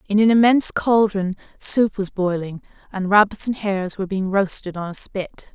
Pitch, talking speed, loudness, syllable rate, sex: 195 Hz, 185 wpm, -19 LUFS, 5.1 syllables/s, female